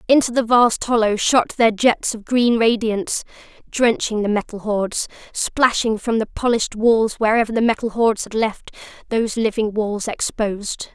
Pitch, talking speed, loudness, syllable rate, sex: 225 Hz, 160 wpm, -19 LUFS, 4.9 syllables/s, female